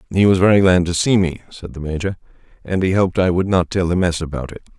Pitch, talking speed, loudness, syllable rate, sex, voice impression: 90 Hz, 265 wpm, -17 LUFS, 6.5 syllables/s, male, very masculine, very adult-like, slightly old, very thick, tensed, very powerful, slightly bright, slightly hard, slightly muffled, fluent, very cool, very intellectual, sincere, very calm, very mature, friendly, reassuring, very unique, elegant, wild, sweet, lively, kind, slightly sharp